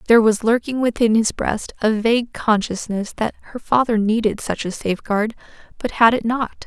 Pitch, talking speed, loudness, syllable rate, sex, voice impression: 225 Hz, 180 wpm, -19 LUFS, 5.2 syllables/s, female, very feminine, slightly young, thin, tensed, slightly powerful, bright, slightly soft, clear, fluent, slightly raspy, cute, intellectual, very refreshing, sincere, calm, friendly, very reassuring, unique, elegant, slightly wild, very sweet, very lively, kind, slightly sharp, light